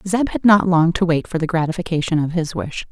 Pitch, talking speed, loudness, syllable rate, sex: 170 Hz, 245 wpm, -18 LUFS, 5.9 syllables/s, female